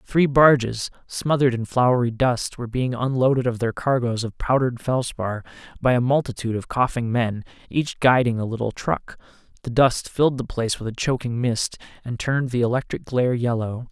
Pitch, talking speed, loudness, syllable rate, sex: 125 Hz, 175 wpm, -22 LUFS, 5.4 syllables/s, male